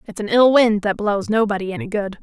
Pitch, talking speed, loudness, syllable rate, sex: 210 Hz, 240 wpm, -18 LUFS, 5.7 syllables/s, female